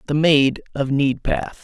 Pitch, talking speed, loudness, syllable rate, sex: 140 Hz, 145 wpm, -19 LUFS, 4.0 syllables/s, male